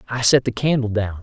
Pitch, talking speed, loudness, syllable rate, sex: 115 Hz, 245 wpm, -19 LUFS, 5.6 syllables/s, male